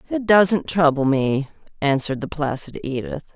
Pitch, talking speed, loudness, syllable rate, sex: 155 Hz, 145 wpm, -20 LUFS, 4.7 syllables/s, female